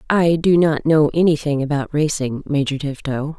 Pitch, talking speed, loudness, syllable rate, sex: 150 Hz, 160 wpm, -18 LUFS, 4.8 syllables/s, female